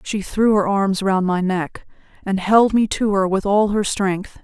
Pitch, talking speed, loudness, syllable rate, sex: 200 Hz, 215 wpm, -18 LUFS, 4.1 syllables/s, female